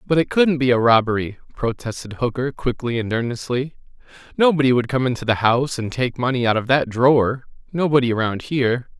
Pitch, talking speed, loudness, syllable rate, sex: 125 Hz, 175 wpm, -19 LUFS, 5.8 syllables/s, male